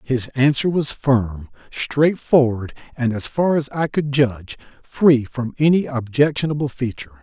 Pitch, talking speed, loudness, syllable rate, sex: 130 Hz, 140 wpm, -19 LUFS, 4.4 syllables/s, male